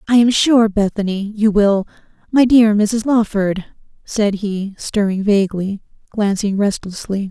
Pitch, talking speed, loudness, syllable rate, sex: 210 Hz, 125 wpm, -16 LUFS, 4.1 syllables/s, female